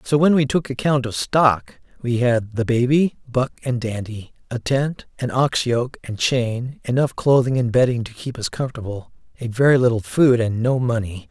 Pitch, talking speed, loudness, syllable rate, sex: 125 Hz, 190 wpm, -20 LUFS, 4.8 syllables/s, male